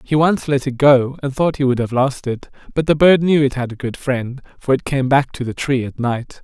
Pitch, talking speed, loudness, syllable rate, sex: 135 Hz, 280 wpm, -17 LUFS, 5.1 syllables/s, male